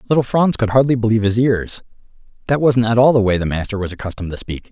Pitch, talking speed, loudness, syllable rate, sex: 115 Hz, 240 wpm, -17 LUFS, 7.0 syllables/s, male